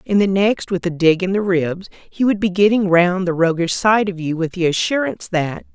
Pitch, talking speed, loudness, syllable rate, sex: 185 Hz, 240 wpm, -17 LUFS, 5.1 syllables/s, female